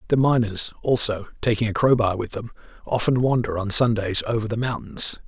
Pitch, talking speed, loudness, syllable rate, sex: 110 Hz, 170 wpm, -22 LUFS, 5.4 syllables/s, male